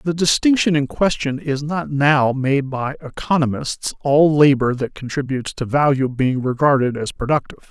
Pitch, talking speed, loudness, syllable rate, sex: 140 Hz, 155 wpm, -18 LUFS, 4.9 syllables/s, male